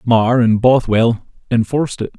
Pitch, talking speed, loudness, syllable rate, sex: 115 Hz, 135 wpm, -15 LUFS, 4.4 syllables/s, male